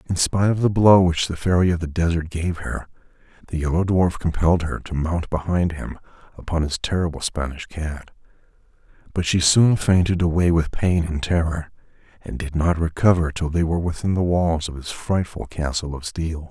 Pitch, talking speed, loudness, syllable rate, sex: 85 Hz, 190 wpm, -21 LUFS, 5.2 syllables/s, male